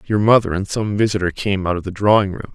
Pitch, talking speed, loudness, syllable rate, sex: 100 Hz, 235 wpm, -18 LUFS, 6.4 syllables/s, male